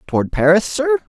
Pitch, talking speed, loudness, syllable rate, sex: 185 Hz, 155 wpm, -16 LUFS, 5.3 syllables/s, male